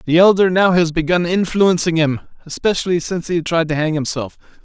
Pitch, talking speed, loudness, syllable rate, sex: 170 Hz, 180 wpm, -16 LUFS, 5.7 syllables/s, male